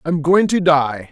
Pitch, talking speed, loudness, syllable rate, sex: 160 Hz, 215 wpm, -15 LUFS, 4.0 syllables/s, male